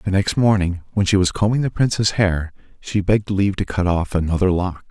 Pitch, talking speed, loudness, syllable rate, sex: 95 Hz, 220 wpm, -19 LUFS, 5.6 syllables/s, male